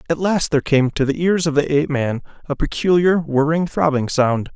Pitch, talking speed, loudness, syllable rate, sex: 150 Hz, 210 wpm, -18 LUFS, 5.4 syllables/s, male